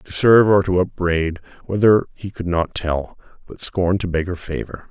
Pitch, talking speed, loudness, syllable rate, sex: 90 Hz, 195 wpm, -19 LUFS, 5.0 syllables/s, male